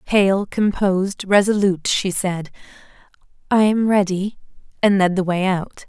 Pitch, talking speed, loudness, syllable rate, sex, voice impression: 195 Hz, 135 wpm, -19 LUFS, 4.4 syllables/s, female, very feminine, young, thin, tensed, slightly powerful, bright, slightly hard, clear, fluent, slightly raspy, cute, intellectual, very refreshing, sincere, calm, very friendly, reassuring, very unique, elegant, wild, sweet, very lively, slightly strict, intense, sharp, slightly light